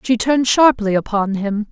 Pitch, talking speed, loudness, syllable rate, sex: 225 Hz, 175 wpm, -16 LUFS, 5.0 syllables/s, female